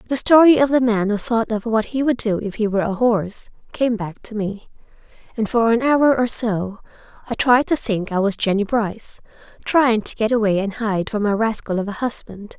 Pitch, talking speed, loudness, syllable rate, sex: 225 Hz, 225 wpm, -19 LUFS, 5.1 syllables/s, female